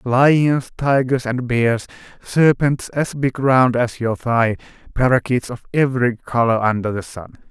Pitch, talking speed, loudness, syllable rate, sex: 125 Hz, 145 wpm, -18 LUFS, 4.1 syllables/s, male